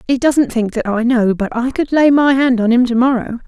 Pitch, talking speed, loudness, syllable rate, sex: 245 Hz, 275 wpm, -14 LUFS, 5.2 syllables/s, female